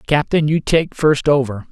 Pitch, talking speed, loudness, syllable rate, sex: 145 Hz, 175 wpm, -16 LUFS, 4.5 syllables/s, male